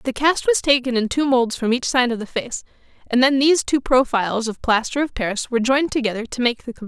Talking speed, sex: 260 wpm, female